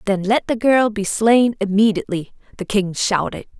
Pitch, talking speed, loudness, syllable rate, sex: 210 Hz, 165 wpm, -18 LUFS, 4.9 syllables/s, female